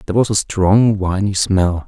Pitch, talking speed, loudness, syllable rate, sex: 100 Hz, 190 wpm, -15 LUFS, 4.7 syllables/s, male